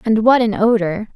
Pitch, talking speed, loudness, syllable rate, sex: 215 Hz, 210 wpm, -15 LUFS, 5.0 syllables/s, female